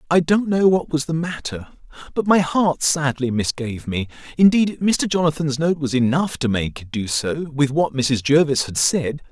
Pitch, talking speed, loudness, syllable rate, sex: 145 Hz, 195 wpm, -20 LUFS, 4.7 syllables/s, male